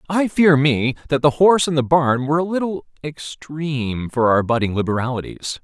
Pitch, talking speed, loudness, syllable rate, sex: 140 Hz, 180 wpm, -18 LUFS, 5.3 syllables/s, male